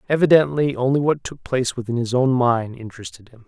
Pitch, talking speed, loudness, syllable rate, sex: 130 Hz, 190 wpm, -19 LUFS, 6.1 syllables/s, male